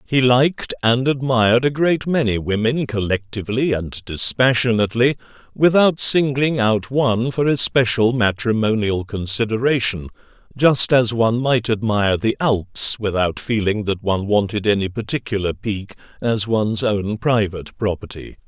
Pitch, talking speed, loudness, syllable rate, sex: 115 Hz, 125 wpm, -18 LUFS, 4.8 syllables/s, male